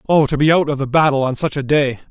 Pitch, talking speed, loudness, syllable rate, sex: 140 Hz, 315 wpm, -16 LUFS, 6.5 syllables/s, male